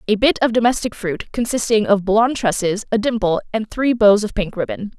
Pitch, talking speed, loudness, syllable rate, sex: 215 Hz, 205 wpm, -18 LUFS, 5.5 syllables/s, female